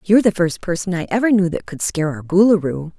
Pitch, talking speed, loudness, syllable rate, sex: 180 Hz, 240 wpm, -18 LUFS, 6.4 syllables/s, female